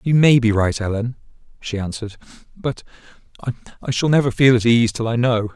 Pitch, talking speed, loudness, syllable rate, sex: 120 Hz, 185 wpm, -18 LUFS, 5.7 syllables/s, male